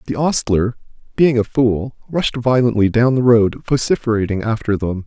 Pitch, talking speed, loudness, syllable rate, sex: 115 Hz, 155 wpm, -17 LUFS, 4.9 syllables/s, male